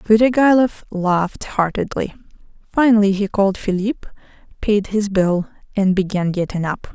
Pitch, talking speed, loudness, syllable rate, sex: 200 Hz, 120 wpm, -18 LUFS, 4.7 syllables/s, female